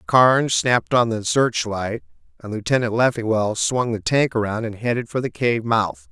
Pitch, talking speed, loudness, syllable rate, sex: 115 Hz, 185 wpm, -20 LUFS, 4.9 syllables/s, male